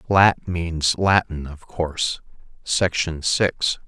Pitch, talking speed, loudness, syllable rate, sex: 85 Hz, 95 wpm, -21 LUFS, 3.1 syllables/s, male